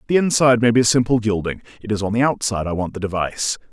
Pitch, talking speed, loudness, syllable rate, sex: 110 Hz, 240 wpm, -19 LUFS, 7.2 syllables/s, male